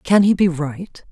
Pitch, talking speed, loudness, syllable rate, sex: 175 Hz, 215 wpm, -17 LUFS, 4.2 syllables/s, female